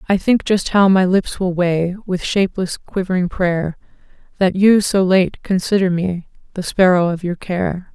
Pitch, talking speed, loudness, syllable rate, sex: 185 Hz, 175 wpm, -17 LUFS, 4.5 syllables/s, female